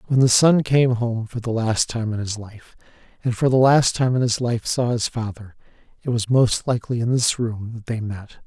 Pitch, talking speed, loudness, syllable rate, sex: 115 Hz, 235 wpm, -20 LUFS, 5.0 syllables/s, male